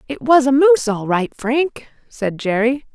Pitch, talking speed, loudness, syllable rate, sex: 250 Hz, 185 wpm, -17 LUFS, 4.4 syllables/s, female